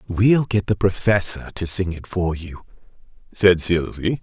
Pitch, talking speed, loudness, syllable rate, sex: 95 Hz, 155 wpm, -20 LUFS, 4.2 syllables/s, male